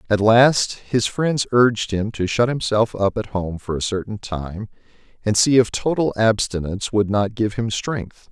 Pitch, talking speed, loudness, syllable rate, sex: 110 Hz, 190 wpm, -20 LUFS, 4.4 syllables/s, male